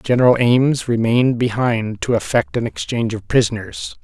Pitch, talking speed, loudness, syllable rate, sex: 115 Hz, 150 wpm, -18 LUFS, 5.1 syllables/s, male